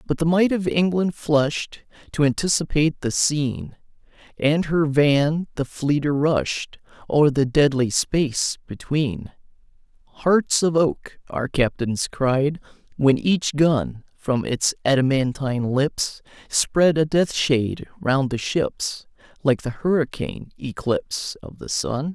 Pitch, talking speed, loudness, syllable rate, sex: 145 Hz, 130 wpm, -21 LUFS, 3.8 syllables/s, male